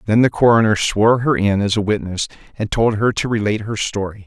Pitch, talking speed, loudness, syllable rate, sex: 105 Hz, 225 wpm, -17 LUFS, 6.0 syllables/s, male